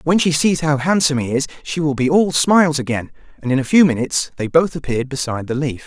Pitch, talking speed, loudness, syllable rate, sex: 145 Hz, 245 wpm, -17 LUFS, 6.5 syllables/s, male